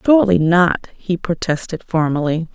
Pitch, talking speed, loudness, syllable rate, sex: 175 Hz, 120 wpm, -17 LUFS, 5.0 syllables/s, female